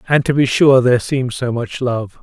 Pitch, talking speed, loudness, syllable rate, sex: 125 Hz, 245 wpm, -15 LUFS, 5.0 syllables/s, male